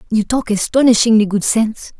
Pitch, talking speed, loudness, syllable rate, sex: 220 Hz, 150 wpm, -14 LUFS, 5.7 syllables/s, female